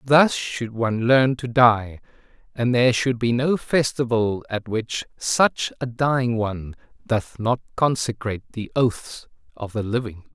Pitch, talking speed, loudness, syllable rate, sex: 120 Hz, 150 wpm, -22 LUFS, 4.1 syllables/s, male